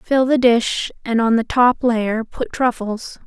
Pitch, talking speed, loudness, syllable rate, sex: 235 Hz, 185 wpm, -18 LUFS, 3.7 syllables/s, female